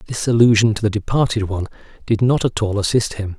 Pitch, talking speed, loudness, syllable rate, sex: 110 Hz, 215 wpm, -18 LUFS, 6.4 syllables/s, male